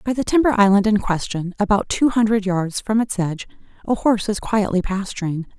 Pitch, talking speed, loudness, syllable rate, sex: 205 Hz, 170 wpm, -19 LUFS, 5.7 syllables/s, female